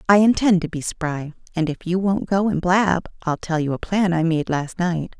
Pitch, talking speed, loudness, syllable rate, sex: 175 Hz, 245 wpm, -21 LUFS, 4.8 syllables/s, female